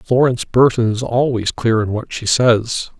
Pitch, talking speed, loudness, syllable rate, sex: 120 Hz, 180 wpm, -16 LUFS, 4.5 syllables/s, male